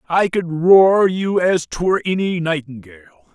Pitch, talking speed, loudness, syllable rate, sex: 165 Hz, 145 wpm, -16 LUFS, 4.7 syllables/s, male